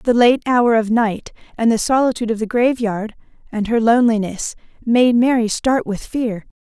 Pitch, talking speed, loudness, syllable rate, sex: 230 Hz, 170 wpm, -17 LUFS, 4.9 syllables/s, female